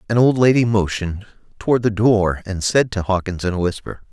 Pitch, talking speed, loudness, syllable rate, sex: 100 Hz, 205 wpm, -18 LUFS, 5.7 syllables/s, male